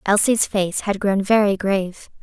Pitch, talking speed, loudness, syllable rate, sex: 200 Hz, 160 wpm, -19 LUFS, 4.5 syllables/s, female